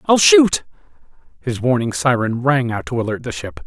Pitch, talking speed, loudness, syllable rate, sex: 120 Hz, 180 wpm, -17 LUFS, 5.0 syllables/s, male